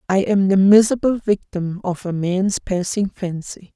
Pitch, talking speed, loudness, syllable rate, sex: 190 Hz, 160 wpm, -18 LUFS, 4.5 syllables/s, female